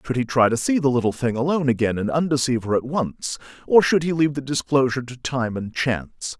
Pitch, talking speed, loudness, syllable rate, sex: 130 Hz, 235 wpm, -21 LUFS, 6.2 syllables/s, male